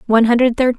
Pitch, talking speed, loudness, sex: 240 Hz, 230 wpm, -14 LUFS, female